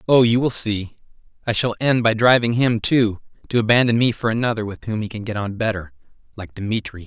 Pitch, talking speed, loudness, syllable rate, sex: 110 Hz, 210 wpm, -19 LUFS, 5.6 syllables/s, male